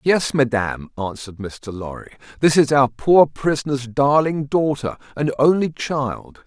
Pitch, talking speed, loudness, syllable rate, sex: 135 Hz, 140 wpm, -19 LUFS, 4.3 syllables/s, male